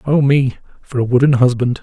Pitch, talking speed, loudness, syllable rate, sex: 130 Hz, 195 wpm, -15 LUFS, 5.5 syllables/s, male